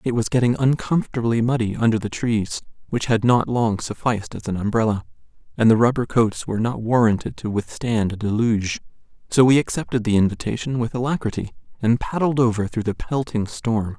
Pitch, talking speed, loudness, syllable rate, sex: 115 Hz, 175 wpm, -21 LUFS, 5.7 syllables/s, male